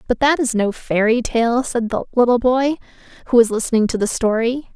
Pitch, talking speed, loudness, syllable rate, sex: 235 Hz, 200 wpm, -17 LUFS, 5.4 syllables/s, female